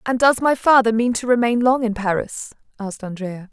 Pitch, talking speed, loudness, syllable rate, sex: 230 Hz, 205 wpm, -18 LUFS, 5.4 syllables/s, female